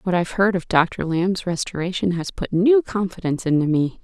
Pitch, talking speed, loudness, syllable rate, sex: 180 Hz, 210 wpm, -21 LUFS, 5.3 syllables/s, female